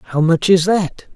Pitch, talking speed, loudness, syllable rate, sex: 175 Hz, 210 wpm, -15 LUFS, 3.7 syllables/s, male